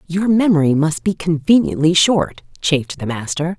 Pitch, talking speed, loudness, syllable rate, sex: 160 Hz, 150 wpm, -16 LUFS, 4.9 syllables/s, female